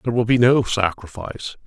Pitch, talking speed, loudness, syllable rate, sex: 110 Hz, 180 wpm, -19 LUFS, 6.1 syllables/s, male